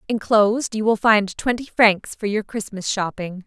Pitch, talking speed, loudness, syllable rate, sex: 210 Hz, 175 wpm, -20 LUFS, 4.6 syllables/s, female